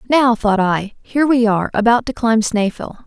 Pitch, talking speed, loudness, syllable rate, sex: 225 Hz, 195 wpm, -16 LUFS, 5.1 syllables/s, female